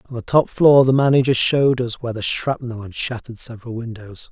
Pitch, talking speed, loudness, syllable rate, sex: 120 Hz, 195 wpm, -18 LUFS, 5.7 syllables/s, male